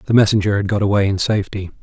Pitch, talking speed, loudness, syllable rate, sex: 100 Hz, 230 wpm, -17 LUFS, 7.7 syllables/s, male